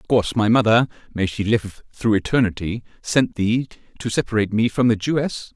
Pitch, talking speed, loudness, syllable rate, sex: 110 Hz, 160 wpm, -20 LUFS, 5.6 syllables/s, male